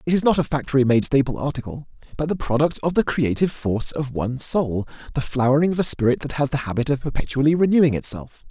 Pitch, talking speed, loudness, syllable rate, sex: 140 Hz, 220 wpm, -21 LUFS, 6.6 syllables/s, male